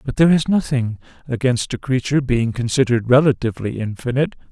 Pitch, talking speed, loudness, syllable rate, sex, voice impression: 125 Hz, 145 wpm, -19 LUFS, 6.5 syllables/s, male, masculine, middle-aged, tensed, slightly weak, soft, raspy, sincere, mature, friendly, reassuring, wild, slightly lively, kind, slightly modest